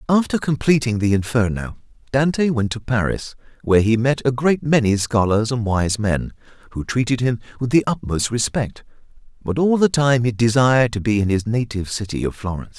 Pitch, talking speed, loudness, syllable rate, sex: 120 Hz, 185 wpm, -19 LUFS, 5.5 syllables/s, male